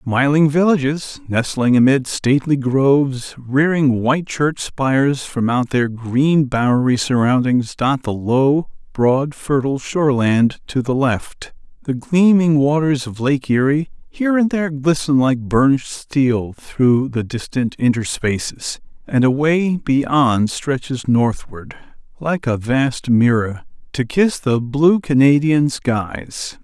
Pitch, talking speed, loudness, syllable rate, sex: 135 Hz, 130 wpm, -17 LUFS, 3.8 syllables/s, male